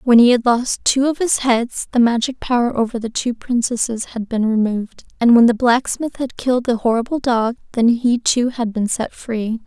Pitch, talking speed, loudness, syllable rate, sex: 240 Hz, 210 wpm, -17 LUFS, 4.9 syllables/s, female